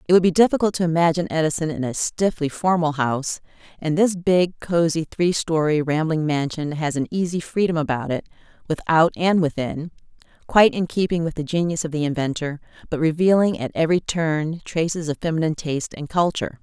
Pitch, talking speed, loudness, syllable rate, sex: 160 Hz, 175 wpm, -21 LUFS, 5.8 syllables/s, female